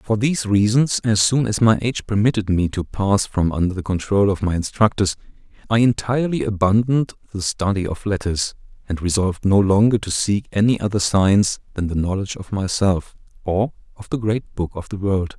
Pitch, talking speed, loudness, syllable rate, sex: 100 Hz, 185 wpm, -20 LUFS, 5.5 syllables/s, male